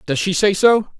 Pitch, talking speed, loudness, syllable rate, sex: 190 Hz, 240 wpm, -16 LUFS, 4.8 syllables/s, male